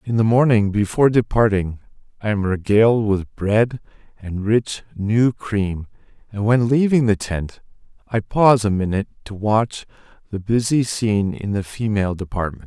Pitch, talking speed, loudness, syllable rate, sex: 105 Hz, 150 wpm, -19 LUFS, 4.8 syllables/s, male